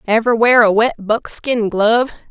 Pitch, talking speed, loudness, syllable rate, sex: 225 Hz, 155 wpm, -14 LUFS, 4.6 syllables/s, female